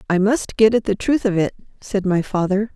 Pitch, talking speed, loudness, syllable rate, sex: 205 Hz, 240 wpm, -19 LUFS, 5.2 syllables/s, female